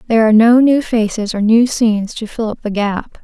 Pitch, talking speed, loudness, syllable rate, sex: 225 Hz, 240 wpm, -14 LUFS, 5.6 syllables/s, female